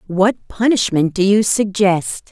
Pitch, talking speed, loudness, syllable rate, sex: 195 Hz, 130 wpm, -16 LUFS, 3.8 syllables/s, female